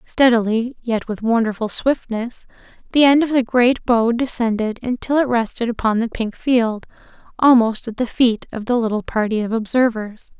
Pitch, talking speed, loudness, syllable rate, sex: 235 Hz, 160 wpm, -18 LUFS, 4.8 syllables/s, female